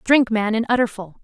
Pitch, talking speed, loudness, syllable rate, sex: 225 Hz, 195 wpm, -19 LUFS, 5.8 syllables/s, female